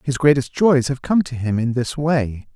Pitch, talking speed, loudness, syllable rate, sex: 135 Hz, 235 wpm, -19 LUFS, 4.6 syllables/s, male